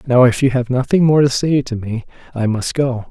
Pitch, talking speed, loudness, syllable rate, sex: 125 Hz, 250 wpm, -16 LUFS, 5.3 syllables/s, male